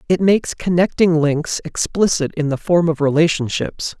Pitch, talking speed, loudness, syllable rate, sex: 165 Hz, 150 wpm, -17 LUFS, 4.8 syllables/s, male